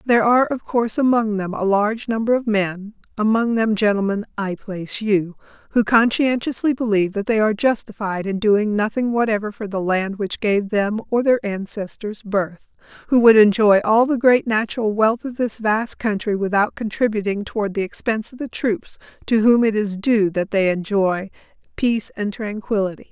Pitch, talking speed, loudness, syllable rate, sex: 215 Hz, 175 wpm, -19 LUFS, 5.2 syllables/s, female